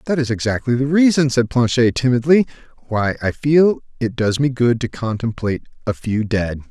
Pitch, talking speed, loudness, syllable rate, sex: 125 Hz, 180 wpm, -18 LUFS, 5.2 syllables/s, male